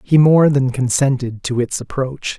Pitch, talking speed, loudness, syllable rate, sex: 135 Hz, 175 wpm, -16 LUFS, 4.4 syllables/s, male